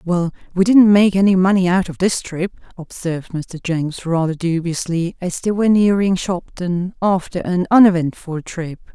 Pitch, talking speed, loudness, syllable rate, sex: 180 Hz, 160 wpm, -17 LUFS, 4.7 syllables/s, female